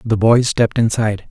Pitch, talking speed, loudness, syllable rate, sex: 110 Hz, 185 wpm, -15 LUFS, 5.8 syllables/s, male